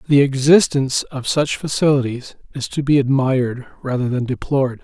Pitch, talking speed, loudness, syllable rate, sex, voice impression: 135 Hz, 150 wpm, -18 LUFS, 5.3 syllables/s, male, masculine, slightly old, slightly thick, sincere, calm, slightly elegant